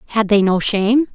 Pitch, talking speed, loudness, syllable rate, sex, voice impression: 215 Hz, 210 wpm, -15 LUFS, 5.7 syllables/s, female, feminine, adult-like, clear, fluent, slightly intellectual, slightly refreshing